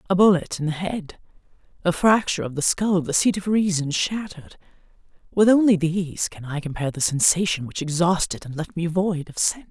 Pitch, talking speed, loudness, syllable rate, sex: 175 Hz, 185 wpm, -22 LUFS, 5.7 syllables/s, female